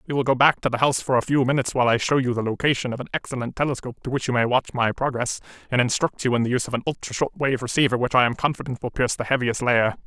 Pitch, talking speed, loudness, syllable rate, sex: 125 Hz, 290 wpm, -22 LUFS, 7.8 syllables/s, male